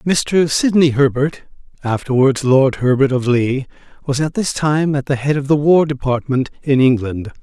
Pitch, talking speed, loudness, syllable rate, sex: 140 Hz, 170 wpm, -16 LUFS, 3.8 syllables/s, male